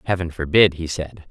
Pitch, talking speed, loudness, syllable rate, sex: 85 Hz, 185 wpm, -19 LUFS, 5.2 syllables/s, male